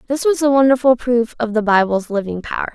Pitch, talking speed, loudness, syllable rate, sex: 235 Hz, 220 wpm, -16 LUFS, 5.9 syllables/s, female